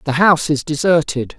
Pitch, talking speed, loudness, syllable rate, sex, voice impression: 155 Hz, 175 wpm, -16 LUFS, 5.5 syllables/s, male, masculine, middle-aged, slightly thick, tensed, slightly powerful, slightly dark, hard, clear, fluent, cool, very intellectual, refreshing, sincere, calm, friendly, reassuring, unique, elegant, slightly wild, slightly sweet, slightly lively, strict, slightly intense